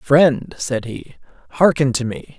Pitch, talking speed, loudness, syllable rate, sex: 140 Hz, 150 wpm, -18 LUFS, 3.6 syllables/s, male